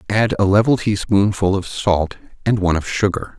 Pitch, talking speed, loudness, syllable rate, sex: 100 Hz, 175 wpm, -18 LUFS, 5.2 syllables/s, male